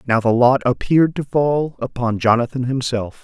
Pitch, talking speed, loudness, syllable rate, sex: 125 Hz, 165 wpm, -18 LUFS, 4.9 syllables/s, male